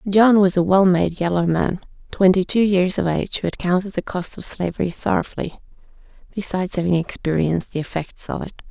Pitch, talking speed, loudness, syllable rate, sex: 180 Hz, 185 wpm, -20 LUFS, 5.9 syllables/s, female